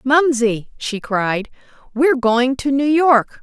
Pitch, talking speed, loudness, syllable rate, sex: 255 Hz, 140 wpm, -17 LUFS, 3.5 syllables/s, female